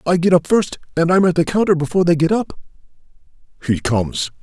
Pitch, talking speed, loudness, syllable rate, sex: 165 Hz, 205 wpm, -17 LUFS, 6.4 syllables/s, male